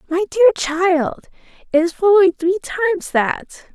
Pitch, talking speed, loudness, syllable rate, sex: 360 Hz, 130 wpm, -17 LUFS, 4.7 syllables/s, female